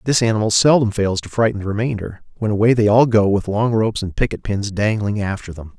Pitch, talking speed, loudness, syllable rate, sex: 105 Hz, 230 wpm, -18 LUFS, 6.1 syllables/s, male